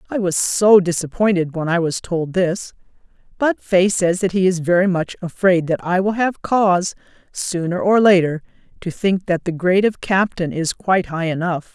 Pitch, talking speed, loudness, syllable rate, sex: 180 Hz, 190 wpm, -18 LUFS, 4.8 syllables/s, female